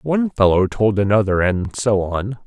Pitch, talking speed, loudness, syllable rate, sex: 110 Hz, 170 wpm, -18 LUFS, 4.6 syllables/s, male